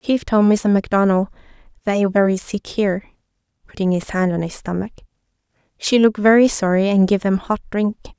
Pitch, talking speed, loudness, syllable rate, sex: 200 Hz, 155 wpm, -18 LUFS, 5.7 syllables/s, female